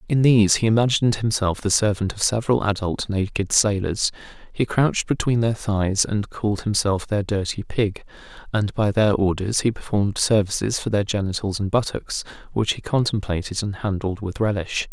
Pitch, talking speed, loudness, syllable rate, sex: 105 Hz, 170 wpm, -22 LUFS, 5.3 syllables/s, male